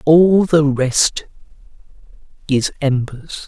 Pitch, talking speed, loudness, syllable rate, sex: 145 Hz, 85 wpm, -15 LUFS, 2.9 syllables/s, male